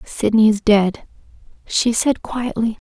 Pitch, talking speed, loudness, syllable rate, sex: 220 Hz, 125 wpm, -17 LUFS, 3.8 syllables/s, female